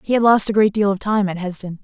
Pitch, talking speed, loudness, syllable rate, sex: 200 Hz, 325 wpm, -17 LUFS, 6.4 syllables/s, female